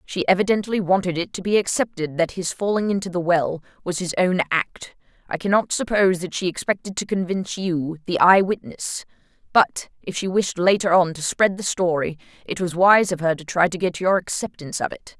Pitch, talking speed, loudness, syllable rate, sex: 180 Hz, 205 wpm, -21 LUFS, 5.4 syllables/s, female